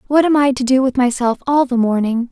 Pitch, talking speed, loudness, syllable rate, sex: 255 Hz, 260 wpm, -15 LUFS, 5.8 syllables/s, female